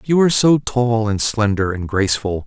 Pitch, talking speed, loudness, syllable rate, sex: 115 Hz, 195 wpm, -17 LUFS, 5.1 syllables/s, male